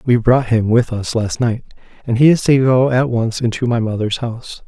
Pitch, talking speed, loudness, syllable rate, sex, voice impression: 120 Hz, 230 wpm, -16 LUFS, 5.1 syllables/s, male, very masculine, very adult-like, very middle-aged, thick, slightly relaxed, weak, slightly dark, soft, slightly muffled, fluent, cool, very intellectual, refreshing, very sincere, very calm, mature, friendly, very reassuring, slightly unique, very elegant, sweet, slightly lively, very kind, modest